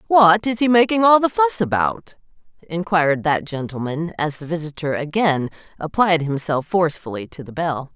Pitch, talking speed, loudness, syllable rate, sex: 170 Hz, 160 wpm, -19 LUFS, 5.1 syllables/s, female